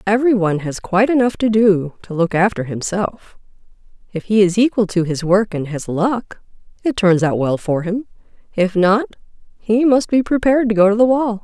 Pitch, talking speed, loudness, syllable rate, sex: 205 Hz, 200 wpm, -17 LUFS, 5.3 syllables/s, female